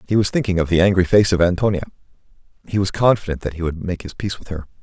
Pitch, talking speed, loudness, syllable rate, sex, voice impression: 95 Hz, 250 wpm, -19 LUFS, 7.3 syllables/s, male, masculine, middle-aged, slightly weak, hard, fluent, raspy, calm, mature, slightly reassuring, slightly wild, slightly kind, slightly strict, slightly modest